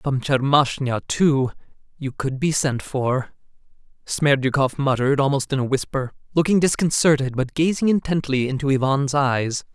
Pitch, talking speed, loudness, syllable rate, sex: 140 Hz, 135 wpm, -21 LUFS, 4.8 syllables/s, male